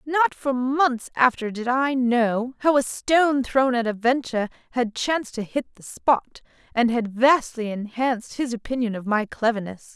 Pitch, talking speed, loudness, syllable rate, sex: 245 Hz, 175 wpm, -23 LUFS, 4.5 syllables/s, female